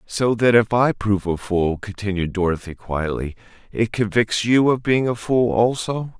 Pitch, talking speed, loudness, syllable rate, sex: 105 Hz, 175 wpm, -20 LUFS, 4.6 syllables/s, male